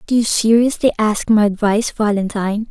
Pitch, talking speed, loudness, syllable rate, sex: 215 Hz, 155 wpm, -16 LUFS, 5.6 syllables/s, female